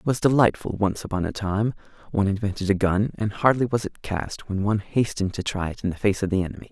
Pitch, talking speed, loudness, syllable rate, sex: 105 Hz, 250 wpm, -24 LUFS, 6.4 syllables/s, male